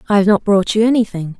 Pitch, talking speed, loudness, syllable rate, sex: 205 Hz, 215 wpm, -14 LUFS, 6.6 syllables/s, female